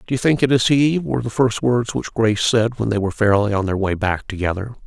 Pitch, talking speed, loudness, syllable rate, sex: 115 Hz, 270 wpm, -19 LUFS, 6.0 syllables/s, male